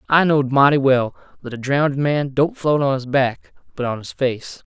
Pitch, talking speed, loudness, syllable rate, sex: 140 Hz, 215 wpm, -19 LUFS, 5.1 syllables/s, male